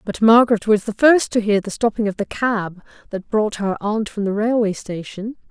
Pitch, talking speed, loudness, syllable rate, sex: 215 Hz, 220 wpm, -18 LUFS, 5.0 syllables/s, female